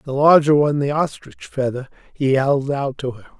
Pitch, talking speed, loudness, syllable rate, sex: 140 Hz, 195 wpm, -18 LUFS, 5.2 syllables/s, male